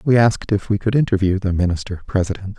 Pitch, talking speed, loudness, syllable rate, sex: 100 Hz, 210 wpm, -19 LUFS, 6.6 syllables/s, male